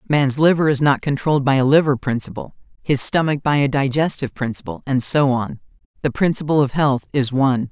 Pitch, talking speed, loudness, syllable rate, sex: 140 Hz, 185 wpm, -18 LUFS, 5.8 syllables/s, female